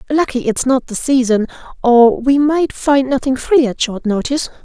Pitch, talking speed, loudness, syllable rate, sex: 260 Hz, 180 wpm, -14 LUFS, 4.8 syllables/s, female